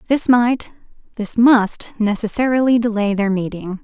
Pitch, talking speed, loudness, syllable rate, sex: 225 Hz, 125 wpm, -17 LUFS, 4.5 syllables/s, female